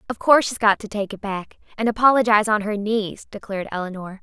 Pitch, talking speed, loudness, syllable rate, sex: 210 Hz, 215 wpm, -20 LUFS, 6.3 syllables/s, female